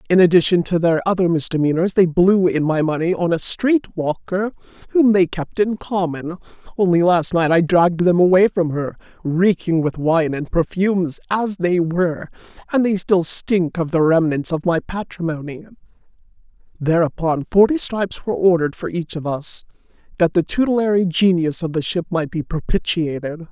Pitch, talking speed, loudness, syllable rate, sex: 175 Hz, 170 wpm, -18 LUFS, 5.1 syllables/s, male